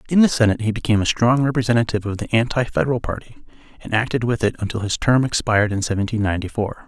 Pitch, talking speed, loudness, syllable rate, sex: 115 Hz, 220 wpm, -20 LUFS, 7.4 syllables/s, male